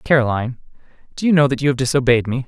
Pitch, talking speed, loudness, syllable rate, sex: 130 Hz, 220 wpm, -17 LUFS, 7.7 syllables/s, male